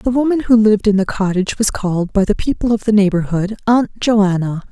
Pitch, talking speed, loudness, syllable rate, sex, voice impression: 210 Hz, 215 wpm, -15 LUFS, 5.9 syllables/s, female, feminine, adult-like, relaxed, weak, soft, raspy, calm, reassuring, elegant, kind, slightly modest